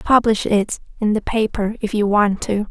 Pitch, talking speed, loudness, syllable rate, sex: 210 Hz, 200 wpm, -19 LUFS, 4.6 syllables/s, female